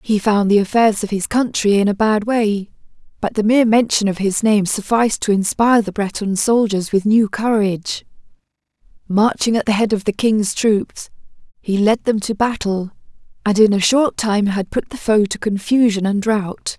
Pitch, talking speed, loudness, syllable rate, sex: 210 Hz, 190 wpm, -17 LUFS, 4.9 syllables/s, female